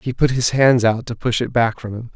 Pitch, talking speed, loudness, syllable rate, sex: 120 Hz, 305 wpm, -17 LUFS, 5.2 syllables/s, male